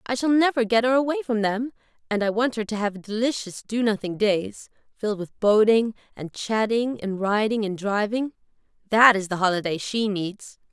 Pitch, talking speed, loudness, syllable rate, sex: 220 Hz, 185 wpm, -23 LUFS, 5.0 syllables/s, female